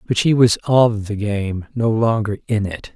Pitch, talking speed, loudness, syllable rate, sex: 110 Hz, 205 wpm, -18 LUFS, 4.3 syllables/s, male